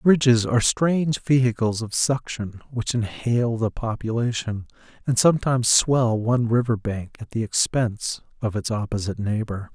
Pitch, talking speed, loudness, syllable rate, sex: 115 Hz, 140 wpm, -22 LUFS, 5.0 syllables/s, male